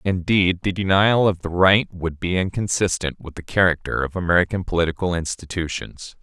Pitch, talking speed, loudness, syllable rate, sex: 90 Hz, 155 wpm, -20 LUFS, 5.3 syllables/s, male